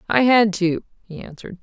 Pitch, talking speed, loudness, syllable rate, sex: 200 Hz, 185 wpm, -18 LUFS, 5.6 syllables/s, female